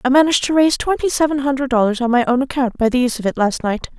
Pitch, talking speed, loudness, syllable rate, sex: 260 Hz, 285 wpm, -17 LUFS, 7.3 syllables/s, female